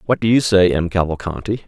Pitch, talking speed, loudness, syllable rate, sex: 100 Hz, 215 wpm, -17 LUFS, 6.0 syllables/s, male